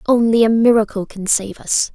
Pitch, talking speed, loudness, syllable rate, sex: 220 Hz, 185 wpm, -16 LUFS, 5.0 syllables/s, female